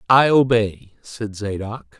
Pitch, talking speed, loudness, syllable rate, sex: 110 Hz, 120 wpm, -19 LUFS, 3.5 syllables/s, male